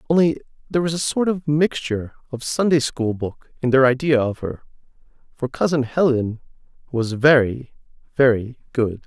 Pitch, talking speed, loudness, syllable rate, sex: 135 Hz, 150 wpm, -20 LUFS, 5.0 syllables/s, male